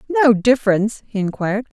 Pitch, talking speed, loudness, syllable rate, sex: 225 Hz, 135 wpm, -18 LUFS, 6.1 syllables/s, female